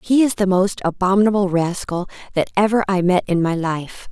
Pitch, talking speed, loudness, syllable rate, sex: 190 Hz, 190 wpm, -18 LUFS, 5.4 syllables/s, female